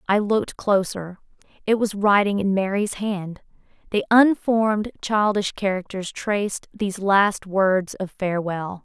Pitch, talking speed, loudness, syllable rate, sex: 200 Hz, 120 wpm, -22 LUFS, 4.2 syllables/s, female